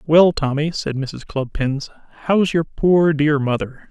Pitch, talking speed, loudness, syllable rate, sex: 150 Hz, 155 wpm, -19 LUFS, 3.9 syllables/s, male